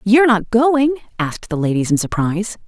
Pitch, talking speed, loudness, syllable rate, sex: 215 Hz, 200 wpm, -17 LUFS, 6.1 syllables/s, female